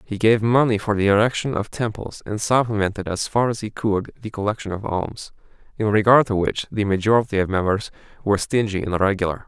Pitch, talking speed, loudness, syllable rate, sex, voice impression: 105 Hz, 195 wpm, -21 LUFS, 5.9 syllables/s, male, very masculine, very adult-like, slightly thick, tensed, slightly weak, slightly bright, soft, slightly muffled, fluent, slightly raspy, cool, very intellectual, refreshing, sincere, very calm, mature, friendly, very reassuring, slightly unique, elegant, slightly wild, sweet, lively, kind, slightly modest